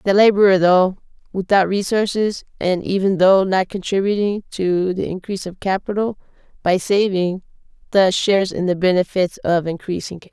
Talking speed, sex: 145 wpm, female